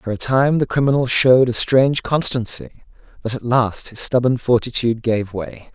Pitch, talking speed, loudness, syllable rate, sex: 120 Hz, 180 wpm, -17 LUFS, 5.1 syllables/s, male